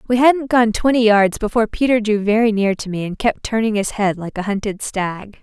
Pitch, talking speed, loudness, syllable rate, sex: 215 Hz, 230 wpm, -17 LUFS, 5.3 syllables/s, female